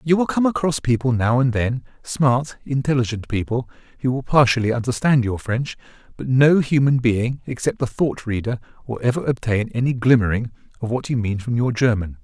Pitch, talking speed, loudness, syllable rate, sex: 125 Hz, 170 wpm, -20 LUFS, 5.3 syllables/s, male